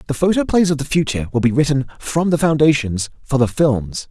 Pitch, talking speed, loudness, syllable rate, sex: 140 Hz, 205 wpm, -17 LUFS, 5.8 syllables/s, male